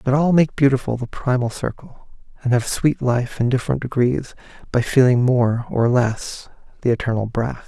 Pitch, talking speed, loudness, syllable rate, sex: 125 Hz, 170 wpm, -19 LUFS, 4.9 syllables/s, male